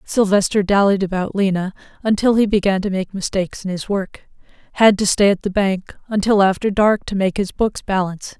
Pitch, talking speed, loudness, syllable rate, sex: 195 Hz, 195 wpm, -18 LUFS, 5.4 syllables/s, female